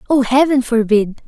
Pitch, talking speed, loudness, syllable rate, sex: 245 Hz, 140 wpm, -14 LUFS, 4.8 syllables/s, female